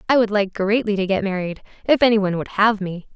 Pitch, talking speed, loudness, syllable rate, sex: 205 Hz, 245 wpm, -20 LUFS, 6.3 syllables/s, female